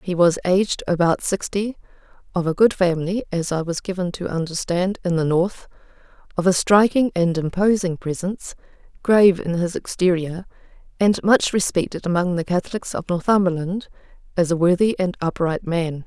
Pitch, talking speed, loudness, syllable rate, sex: 180 Hz, 150 wpm, -20 LUFS, 5.3 syllables/s, female